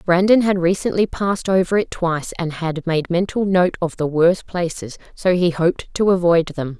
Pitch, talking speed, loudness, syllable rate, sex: 175 Hz, 195 wpm, -19 LUFS, 5.0 syllables/s, female